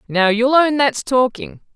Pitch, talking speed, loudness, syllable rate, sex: 250 Hz, 170 wpm, -16 LUFS, 4.1 syllables/s, female